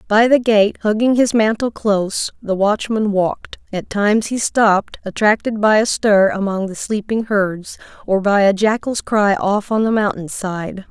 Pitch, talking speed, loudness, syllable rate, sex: 210 Hz, 175 wpm, -17 LUFS, 4.5 syllables/s, female